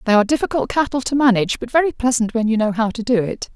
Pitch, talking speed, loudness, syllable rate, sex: 235 Hz, 270 wpm, -18 LUFS, 7.1 syllables/s, female